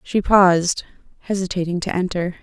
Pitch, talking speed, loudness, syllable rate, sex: 180 Hz, 125 wpm, -19 LUFS, 5.3 syllables/s, female